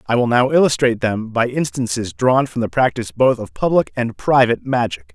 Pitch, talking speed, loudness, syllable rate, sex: 120 Hz, 200 wpm, -17 LUFS, 5.6 syllables/s, male